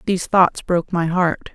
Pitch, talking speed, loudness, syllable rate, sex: 175 Hz, 195 wpm, -18 LUFS, 5.5 syllables/s, female